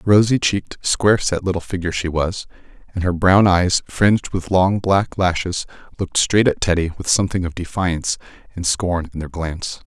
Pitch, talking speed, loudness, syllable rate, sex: 90 Hz, 190 wpm, -19 LUFS, 5.5 syllables/s, male